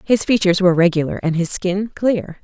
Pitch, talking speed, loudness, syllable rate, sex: 185 Hz, 195 wpm, -17 LUFS, 5.7 syllables/s, female